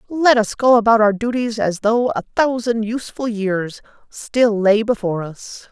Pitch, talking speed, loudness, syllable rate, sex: 220 Hz, 170 wpm, -17 LUFS, 4.5 syllables/s, female